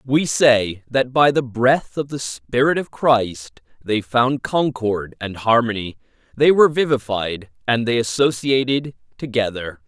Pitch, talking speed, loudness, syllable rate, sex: 120 Hz, 140 wpm, -19 LUFS, 4.0 syllables/s, male